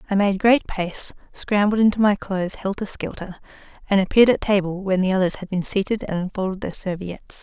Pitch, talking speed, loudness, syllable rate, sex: 195 Hz, 195 wpm, -21 LUFS, 5.8 syllables/s, female